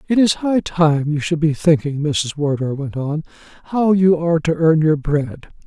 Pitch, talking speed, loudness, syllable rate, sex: 160 Hz, 200 wpm, -17 LUFS, 4.6 syllables/s, male